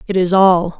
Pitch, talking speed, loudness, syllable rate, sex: 185 Hz, 225 wpm, -13 LUFS, 4.8 syllables/s, female